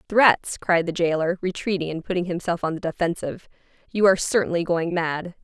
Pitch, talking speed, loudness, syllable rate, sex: 175 Hz, 175 wpm, -23 LUFS, 5.8 syllables/s, female